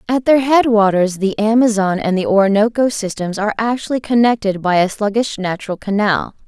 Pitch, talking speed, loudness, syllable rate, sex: 215 Hz, 160 wpm, -16 LUFS, 5.5 syllables/s, female